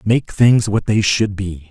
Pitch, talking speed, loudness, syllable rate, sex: 105 Hz, 210 wpm, -16 LUFS, 3.7 syllables/s, male